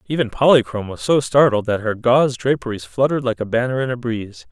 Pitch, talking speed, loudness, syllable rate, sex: 120 Hz, 215 wpm, -18 LUFS, 6.5 syllables/s, male